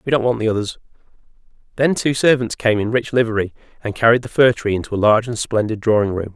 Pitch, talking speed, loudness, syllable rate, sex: 115 Hz, 225 wpm, -18 LUFS, 6.6 syllables/s, male